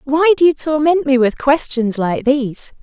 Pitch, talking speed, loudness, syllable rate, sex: 275 Hz, 190 wpm, -15 LUFS, 4.6 syllables/s, female